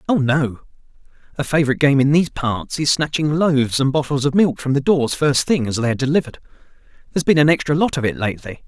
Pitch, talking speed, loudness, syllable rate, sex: 145 Hz, 215 wpm, -18 LUFS, 6.6 syllables/s, male